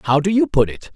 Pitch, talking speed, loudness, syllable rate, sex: 160 Hz, 315 wpm, -18 LUFS, 5.6 syllables/s, male